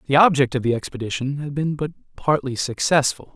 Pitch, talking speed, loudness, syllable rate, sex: 140 Hz, 180 wpm, -21 LUFS, 5.8 syllables/s, male